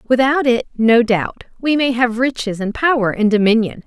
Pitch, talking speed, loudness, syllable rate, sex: 235 Hz, 185 wpm, -16 LUFS, 4.9 syllables/s, female